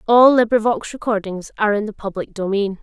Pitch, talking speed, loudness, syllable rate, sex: 215 Hz, 170 wpm, -18 LUFS, 5.9 syllables/s, female